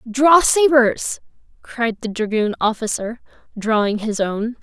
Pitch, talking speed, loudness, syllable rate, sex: 230 Hz, 115 wpm, -18 LUFS, 3.9 syllables/s, female